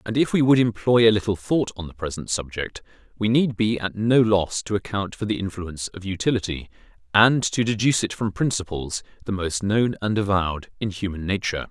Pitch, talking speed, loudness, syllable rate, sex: 105 Hz, 200 wpm, -23 LUFS, 5.6 syllables/s, male